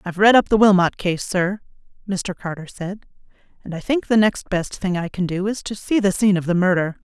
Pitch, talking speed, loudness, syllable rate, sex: 190 Hz, 235 wpm, -20 LUFS, 5.8 syllables/s, female